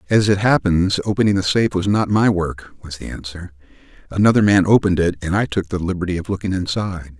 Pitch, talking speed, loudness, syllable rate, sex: 95 Hz, 210 wpm, -18 LUFS, 6.4 syllables/s, male